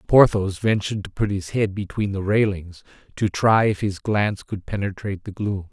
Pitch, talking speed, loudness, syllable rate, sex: 100 Hz, 190 wpm, -22 LUFS, 5.2 syllables/s, male